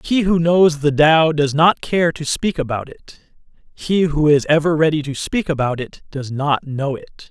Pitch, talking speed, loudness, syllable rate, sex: 155 Hz, 205 wpm, -17 LUFS, 4.6 syllables/s, male